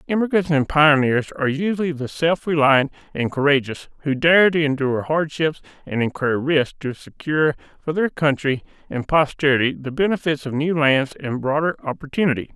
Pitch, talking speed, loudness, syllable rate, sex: 145 Hz, 160 wpm, -20 LUFS, 5.4 syllables/s, male